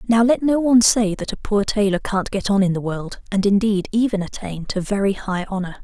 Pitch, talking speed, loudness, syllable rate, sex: 205 Hz, 235 wpm, -20 LUFS, 5.4 syllables/s, female